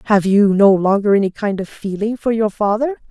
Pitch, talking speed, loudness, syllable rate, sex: 205 Hz, 195 wpm, -16 LUFS, 5.0 syllables/s, female